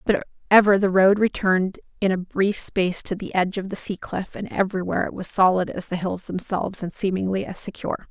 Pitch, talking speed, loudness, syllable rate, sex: 190 Hz, 215 wpm, -22 LUFS, 6.0 syllables/s, female